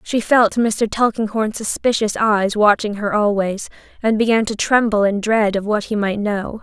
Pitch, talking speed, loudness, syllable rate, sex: 215 Hz, 180 wpm, -17 LUFS, 4.5 syllables/s, female